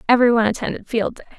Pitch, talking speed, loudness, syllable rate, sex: 230 Hz, 175 wpm, -19 LUFS, 8.3 syllables/s, female